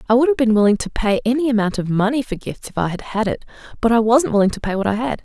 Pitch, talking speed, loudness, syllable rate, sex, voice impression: 225 Hz, 310 wpm, -18 LUFS, 6.9 syllables/s, female, very feminine, slightly gender-neutral, adult-like, slightly middle-aged, thin, tensed, slightly powerful, bright, hard, very clear, very fluent, cute, slightly cool, very intellectual, refreshing, very sincere, slightly calm, friendly, reassuring, unique, elegant, sweet, lively, strict, intense, sharp